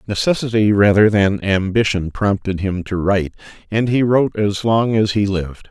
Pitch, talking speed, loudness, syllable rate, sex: 105 Hz, 170 wpm, -17 LUFS, 5.0 syllables/s, male